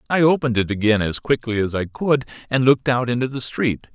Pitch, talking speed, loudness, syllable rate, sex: 120 Hz, 230 wpm, -20 LUFS, 6.1 syllables/s, male